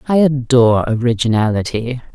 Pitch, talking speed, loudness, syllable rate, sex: 125 Hz, 85 wpm, -15 LUFS, 5.5 syllables/s, female